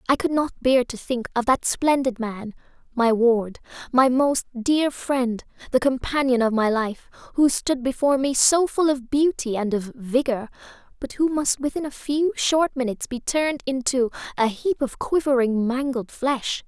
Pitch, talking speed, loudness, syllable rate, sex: 260 Hz, 175 wpm, -22 LUFS, 4.5 syllables/s, female